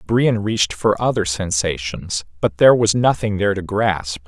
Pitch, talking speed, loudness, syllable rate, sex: 100 Hz, 170 wpm, -18 LUFS, 4.8 syllables/s, male